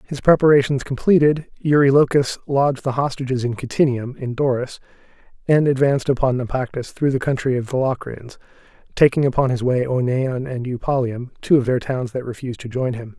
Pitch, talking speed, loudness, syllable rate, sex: 130 Hz, 170 wpm, -19 LUFS, 5.6 syllables/s, male